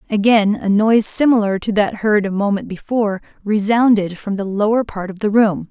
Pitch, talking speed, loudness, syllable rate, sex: 210 Hz, 190 wpm, -16 LUFS, 5.3 syllables/s, female